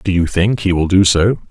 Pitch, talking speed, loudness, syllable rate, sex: 95 Hz, 280 wpm, -14 LUFS, 5.0 syllables/s, male